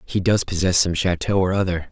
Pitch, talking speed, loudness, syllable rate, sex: 90 Hz, 220 wpm, -20 LUFS, 5.6 syllables/s, male